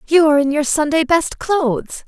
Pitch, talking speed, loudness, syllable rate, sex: 300 Hz, 205 wpm, -16 LUFS, 5.2 syllables/s, female